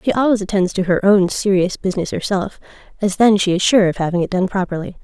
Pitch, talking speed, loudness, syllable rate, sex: 190 Hz, 225 wpm, -17 LUFS, 6.3 syllables/s, female